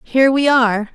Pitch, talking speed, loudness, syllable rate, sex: 250 Hz, 190 wpm, -14 LUFS, 6.0 syllables/s, female